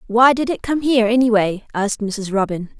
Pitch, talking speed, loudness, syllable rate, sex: 225 Hz, 215 wpm, -18 LUFS, 5.7 syllables/s, female